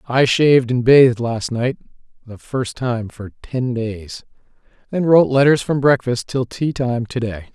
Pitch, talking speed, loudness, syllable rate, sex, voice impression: 125 Hz, 175 wpm, -17 LUFS, 4.7 syllables/s, male, very masculine, very adult-like, middle-aged, thick, tensed, slightly powerful, slightly bright, slightly soft, slightly clear, fluent, raspy, very cool, intellectual, slightly refreshing, sincere, calm, slightly mature, friendly, reassuring, slightly unique, elegant, slightly sweet, slightly lively, kind